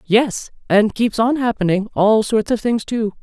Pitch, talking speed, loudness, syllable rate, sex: 220 Hz, 185 wpm, -17 LUFS, 4.2 syllables/s, female